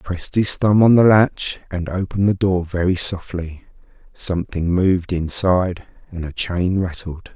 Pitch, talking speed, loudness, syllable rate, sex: 90 Hz, 165 wpm, -18 LUFS, 4.9 syllables/s, male